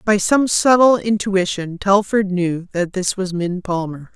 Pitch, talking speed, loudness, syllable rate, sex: 190 Hz, 160 wpm, -17 LUFS, 4.0 syllables/s, female